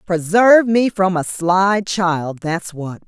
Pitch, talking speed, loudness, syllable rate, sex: 185 Hz, 155 wpm, -16 LUFS, 3.5 syllables/s, female